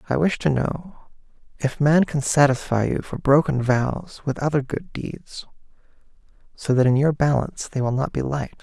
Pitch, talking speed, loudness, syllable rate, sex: 140 Hz, 180 wpm, -22 LUFS, 4.7 syllables/s, male